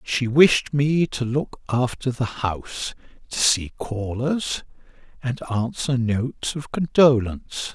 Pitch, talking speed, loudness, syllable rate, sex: 125 Hz, 125 wpm, -22 LUFS, 3.7 syllables/s, male